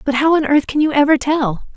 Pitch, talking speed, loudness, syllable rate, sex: 285 Hz, 275 wpm, -15 LUFS, 5.8 syllables/s, female